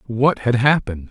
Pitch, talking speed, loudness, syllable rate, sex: 120 Hz, 165 wpm, -18 LUFS, 5.3 syllables/s, male